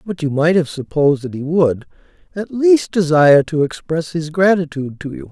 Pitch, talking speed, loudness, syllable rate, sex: 160 Hz, 190 wpm, -16 LUFS, 5.3 syllables/s, male